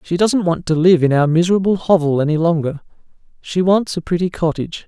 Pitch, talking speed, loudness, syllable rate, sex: 170 Hz, 195 wpm, -16 LUFS, 6.0 syllables/s, male